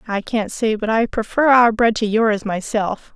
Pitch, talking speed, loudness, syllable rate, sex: 220 Hz, 210 wpm, -18 LUFS, 4.4 syllables/s, female